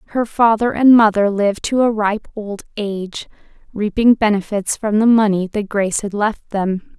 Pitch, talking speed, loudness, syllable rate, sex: 210 Hz, 170 wpm, -16 LUFS, 4.8 syllables/s, female